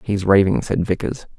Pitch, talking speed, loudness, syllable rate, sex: 95 Hz, 175 wpm, -18 LUFS, 5.0 syllables/s, male